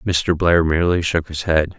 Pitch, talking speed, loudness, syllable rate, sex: 85 Hz, 200 wpm, -18 LUFS, 4.6 syllables/s, male